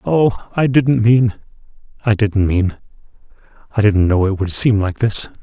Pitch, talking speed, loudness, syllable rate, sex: 110 Hz, 145 wpm, -16 LUFS, 4.2 syllables/s, male